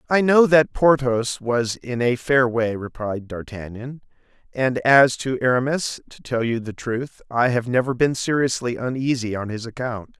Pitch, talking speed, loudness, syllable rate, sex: 125 Hz, 170 wpm, -21 LUFS, 4.4 syllables/s, male